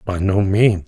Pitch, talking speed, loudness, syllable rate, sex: 95 Hz, 205 wpm, -17 LUFS, 3.9 syllables/s, male